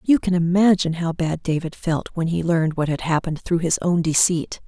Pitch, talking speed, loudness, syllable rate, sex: 170 Hz, 220 wpm, -21 LUFS, 5.5 syllables/s, female